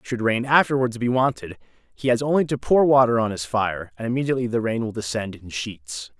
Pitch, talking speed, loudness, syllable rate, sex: 115 Hz, 215 wpm, -22 LUFS, 5.7 syllables/s, male